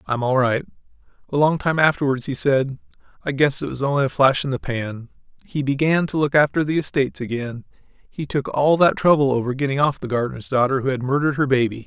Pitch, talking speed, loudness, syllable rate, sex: 135 Hz, 215 wpm, -20 LUFS, 6.1 syllables/s, male